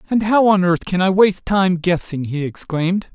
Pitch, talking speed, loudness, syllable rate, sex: 185 Hz, 210 wpm, -17 LUFS, 5.1 syllables/s, male